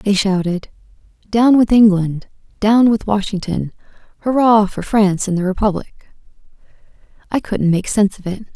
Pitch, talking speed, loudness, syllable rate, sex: 200 Hz, 125 wpm, -16 LUFS, 5.0 syllables/s, female